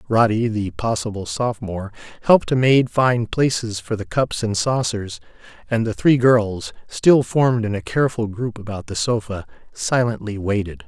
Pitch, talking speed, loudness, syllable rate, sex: 110 Hz, 160 wpm, -20 LUFS, 4.8 syllables/s, male